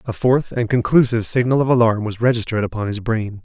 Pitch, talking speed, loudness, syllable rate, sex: 115 Hz, 210 wpm, -18 LUFS, 6.3 syllables/s, male